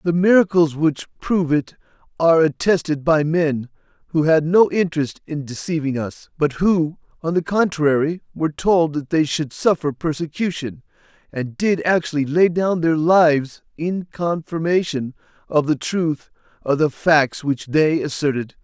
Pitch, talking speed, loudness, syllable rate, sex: 160 Hz, 150 wpm, -19 LUFS, 4.5 syllables/s, male